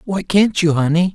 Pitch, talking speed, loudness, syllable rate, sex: 175 Hz, 210 wpm, -16 LUFS, 4.9 syllables/s, male